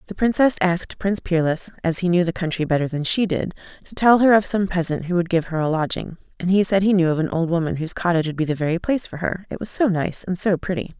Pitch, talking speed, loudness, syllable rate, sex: 175 Hz, 280 wpm, -21 LUFS, 6.5 syllables/s, female